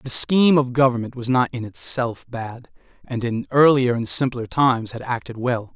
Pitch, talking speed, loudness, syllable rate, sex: 125 Hz, 190 wpm, -20 LUFS, 4.9 syllables/s, male